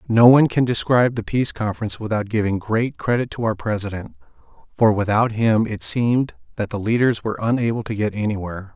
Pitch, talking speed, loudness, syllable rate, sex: 110 Hz, 185 wpm, -20 LUFS, 6.2 syllables/s, male